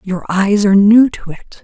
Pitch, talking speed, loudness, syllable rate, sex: 200 Hz, 220 wpm, -11 LUFS, 4.7 syllables/s, female